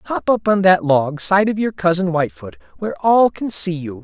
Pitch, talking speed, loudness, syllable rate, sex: 175 Hz, 225 wpm, -17 LUFS, 5.1 syllables/s, male